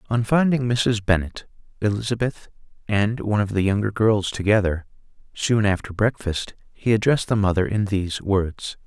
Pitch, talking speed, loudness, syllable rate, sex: 105 Hz, 150 wpm, -22 LUFS, 5.1 syllables/s, male